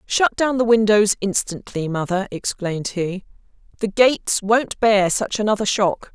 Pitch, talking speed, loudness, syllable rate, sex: 205 Hz, 145 wpm, -19 LUFS, 4.5 syllables/s, female